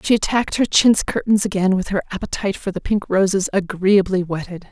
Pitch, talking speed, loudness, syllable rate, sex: 195 Hz, 190 wpm, -19 LUFS, 5.8 syllables/s, female